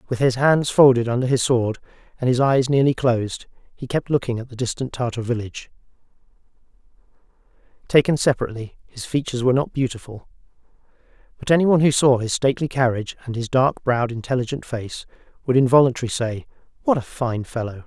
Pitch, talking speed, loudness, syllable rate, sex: 125 Hz, 160 wpm, -20 LUFS, 6.4 syllables/s, male